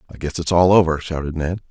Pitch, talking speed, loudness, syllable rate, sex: 85 Hz, 245 wpm, -18 LUFS, 6.7 syllables/s, male